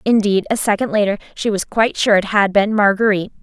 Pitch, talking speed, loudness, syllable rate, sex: 205 Hz, 210 wpm, -16 LUFS, 6.2 syllables/s, female